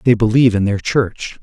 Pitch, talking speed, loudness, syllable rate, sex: 110 Hz, 210 wpm, -15 LUFS, 5.4 syllables/s, male